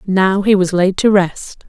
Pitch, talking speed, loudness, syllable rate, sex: 190 Hz, 215 wpm, -14 LUFS, 3.9 syllables/s, female